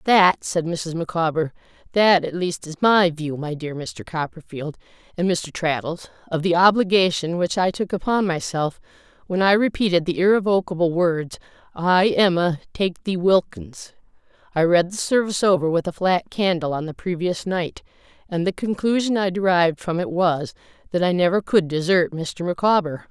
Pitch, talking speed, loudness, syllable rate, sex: 175 Hz, 165 wpm, -21 LUFS, 4.9 syllables/s, female